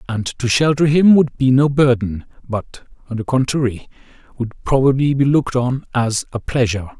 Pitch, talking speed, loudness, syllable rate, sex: 130 Hz, 170 wpm, -17 LUFS, 5.1 syllables/s, male